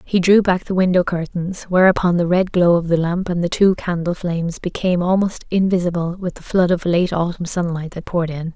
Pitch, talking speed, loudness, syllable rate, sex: 175 Hz, 215 wpm, -18 LUFS, 5.5 syllables/s, female